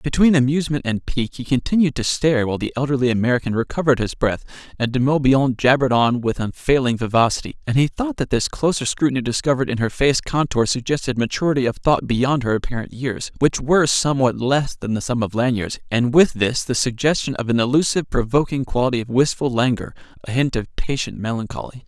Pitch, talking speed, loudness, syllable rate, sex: 130 Hz, 185 wpm, -19 LUFS, 6.2 syllables/s, male